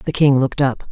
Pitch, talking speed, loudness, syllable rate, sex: 135 Hz, 265 wpm, -16 LUFS, 5.9 syllables/s, female